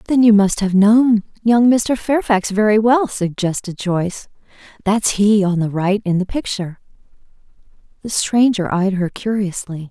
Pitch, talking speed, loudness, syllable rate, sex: 205 Hz, 150 wpm, -16 LUFS, 4.5 syllables/s, female